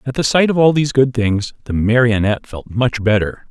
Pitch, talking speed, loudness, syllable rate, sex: 120 Hz, 225 wpm, -16 LUFS, 5.6 syllables/s, male